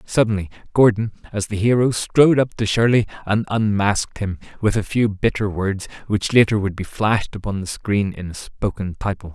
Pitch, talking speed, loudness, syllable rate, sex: 105 Hz, 185 wpm, -20 LUFS, 5.3 syllables/s, male